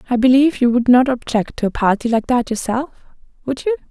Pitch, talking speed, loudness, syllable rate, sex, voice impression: 250 Hz, 215 wpm, -16 LUFS, 6.0 syllables/s, female, very feminine, young, slightly adult-like, very thin, very tensed, slightly powerful, very bright, hard, very clear, very fluent, slightly raspy, very cute, intellectual, very refreshing, sincere, calm, friendly, reassuring, very unique, very elegant, sweet, lively, kind, sharp, slightly modest, very light